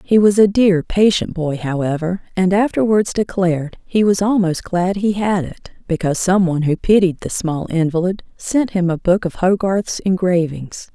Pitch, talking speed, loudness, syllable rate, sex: 185 Hz, 175 wpm, -17 LUFS, 4.7 syllables/s, female